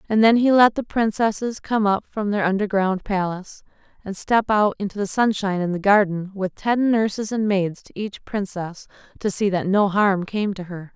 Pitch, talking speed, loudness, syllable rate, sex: 200 Hz, 205 wpm, -21 LUFS, 4.9 syllables/s, female